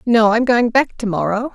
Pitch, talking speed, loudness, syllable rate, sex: 230 Hz, 235 wpm, -16 LUFS, 5.2 syllables/s, female